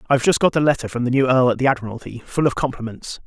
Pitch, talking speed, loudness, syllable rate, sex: 130 Hz, 295 wpm, -19 LUFS, 7.3 syllables/s, male